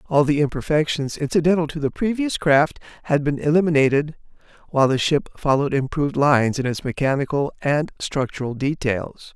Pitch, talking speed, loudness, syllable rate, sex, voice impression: 145 Hz, 150 wpm, -21 LUFS, 5.6 syllables/s, male, masculine, adult-like, bright, slightly soft, clear, fluent, intellectual, slightly refreshing, friendly, unique, kind, light